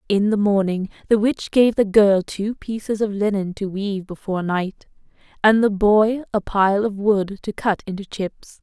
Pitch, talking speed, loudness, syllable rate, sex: 205 Hz, 190 wpm, -20 LUFS, 4.5 syllables/s, female